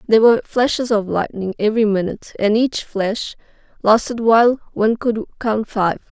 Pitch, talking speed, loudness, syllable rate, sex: 220 Hz, 155 wpm, -18 LUFS, 5.2 syllables/s, female